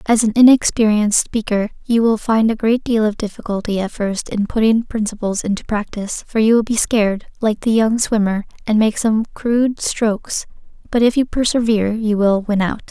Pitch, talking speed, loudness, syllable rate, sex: 220 Hz, 190 wpm, -17 LUFS, 5.3 syllables/s, female